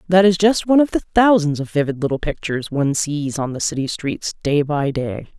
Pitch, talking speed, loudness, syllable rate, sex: 160 Hz, 225 wpm, -19 LUFS, 5.5 syllables/s, female